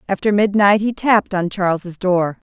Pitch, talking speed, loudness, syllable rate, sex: 195 Hz, 165 wpm, -17 LUFS, 4.9 syllables/s, female